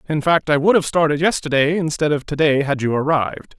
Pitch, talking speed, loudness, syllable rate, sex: 150 Hz, 235 wpm, -18 LUFS, 5.9 syllables/s, male